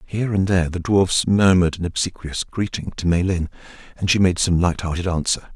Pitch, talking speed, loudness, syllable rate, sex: 90 Hz, 185 wpm, -20 LUFS, 5.7 syllables/s, male